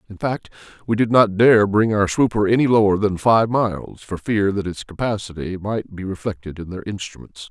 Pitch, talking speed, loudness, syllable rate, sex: 105 Hz, 200 wpm, -19 LUFS, 5.2 syllables/s, male